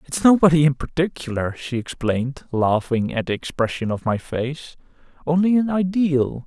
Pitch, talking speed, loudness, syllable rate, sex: 140 Hz, 150 wpm, -21 LUFS, 4.9 syllables/s, male